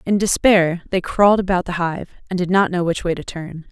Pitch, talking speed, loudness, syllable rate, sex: 180 Hz, 240 wpm, -18 LUFS, 5.5 syllables/s, female